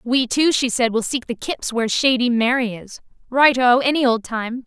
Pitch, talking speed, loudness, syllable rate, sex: 245 Hz, 205 wpm, -18 LUFS, 4.8 syllables/s, female